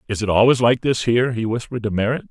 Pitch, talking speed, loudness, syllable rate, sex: 120 Hz, 260 wpm, -19 LUFS, 7.2 syllables/s, male